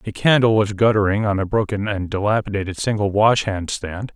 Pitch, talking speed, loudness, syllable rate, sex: 105 Hz, 175 wpm, -19 LUFS, 5.5 syllables/s, male